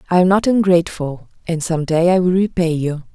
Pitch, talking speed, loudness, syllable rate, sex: 175 Hz, 210 wpm, -17 LUFS, 5.6 syllables/s, female